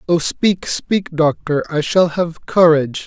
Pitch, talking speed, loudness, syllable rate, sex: 165 Hz, 155 wpm, -16 LUFS, 3.9 syllables/s, male